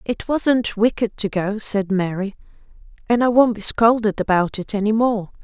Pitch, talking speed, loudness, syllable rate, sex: 215 Hz, 175 wpm, -19 LUFS, 4.6 syllables/s, female